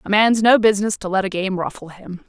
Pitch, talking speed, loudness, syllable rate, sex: 195 Hz, 265 wpm, -18 LUFS, 6.0 syllables/s, female